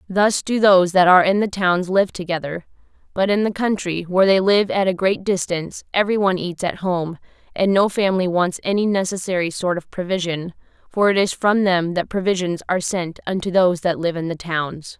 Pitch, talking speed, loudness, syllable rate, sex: 185 Hz, 205 wpm, -19 LUFS, 5.6 syllables/s, female